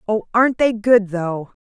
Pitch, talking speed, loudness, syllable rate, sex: 210 Hz, 185 wpm, -17 LUFS, 4.4 syllables/s, female